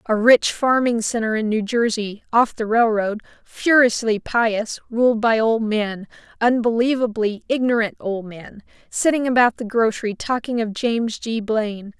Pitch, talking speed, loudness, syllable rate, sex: 225 Hz, 145 wpm, -20 LUFS, 4.5 syllables/s, female